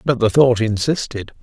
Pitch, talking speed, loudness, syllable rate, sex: 120 Hz, 170 wpm, -17 LUFS, 4.7 syllables/s, male